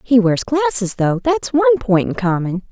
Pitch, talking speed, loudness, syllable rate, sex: 225 Hz, 200 wpm, -16 LUFS, 5.1 syllables/s, female